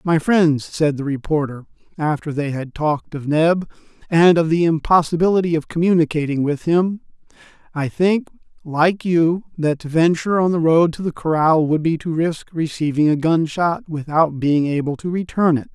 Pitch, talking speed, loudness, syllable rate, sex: 160 Hz, 170 wpm, -18 LUFS, 5.0 syllables/s, male